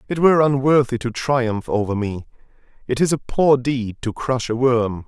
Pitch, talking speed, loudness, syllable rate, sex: 125 Hz, 180 wpm, -19 LUFS, 4.7 syllables/s, male